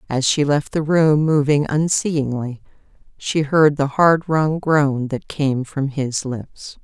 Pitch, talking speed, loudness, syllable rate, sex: 145 Hz, 160 wpm, -18 LUFS, 3.5 syllables/s, female